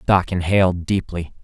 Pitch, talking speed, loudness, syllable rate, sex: 90 Hz, 125 wpm, -19 LUFS, 4.8 syllables/s, male